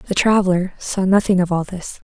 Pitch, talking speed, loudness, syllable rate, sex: 185 Hz, 200 wpm, -18 LUFS, 5.2 syllables/s, female